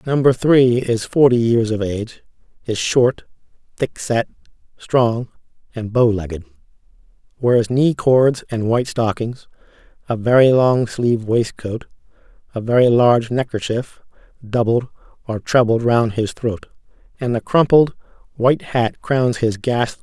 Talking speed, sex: 140 wpm, male